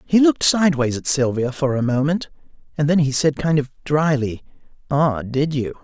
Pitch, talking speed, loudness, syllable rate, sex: 140 Hz, 185 wpm, -19 LUFS, 5.2 syllables/s, male